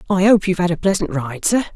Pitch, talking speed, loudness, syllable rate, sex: 180 Hz, 275 wpm, -17 LUFS, 6.8 syllables/s, female